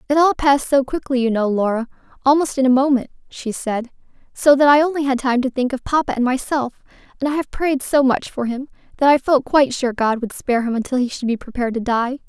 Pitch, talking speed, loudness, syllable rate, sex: 260 Hz, 245 wpm, -18 LUFS, 6.1 syllables/s, female